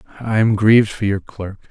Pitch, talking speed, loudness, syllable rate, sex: 105 Hz, 210 wpm, -16 LUFS, 5.4 syllables/s, male